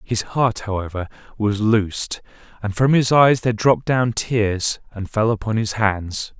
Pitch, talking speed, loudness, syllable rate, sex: 110 Hz, 170 wpm, -20 LUFS, 4.4 syllables/s, male